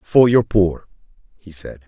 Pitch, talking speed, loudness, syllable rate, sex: 95 Hz, 160 wpm, -16 LUFS, 4.1 syllables/s, male